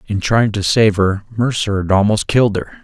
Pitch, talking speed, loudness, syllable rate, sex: 110 Hz, 210 wpm, -15 LUFS, 5.1 syllables/s, male